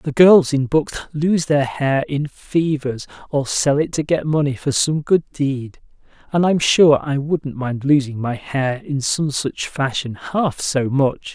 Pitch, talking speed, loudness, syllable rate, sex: 145 Hz, 185 wpm, -18 LUFS, 3.8 syllables/s, male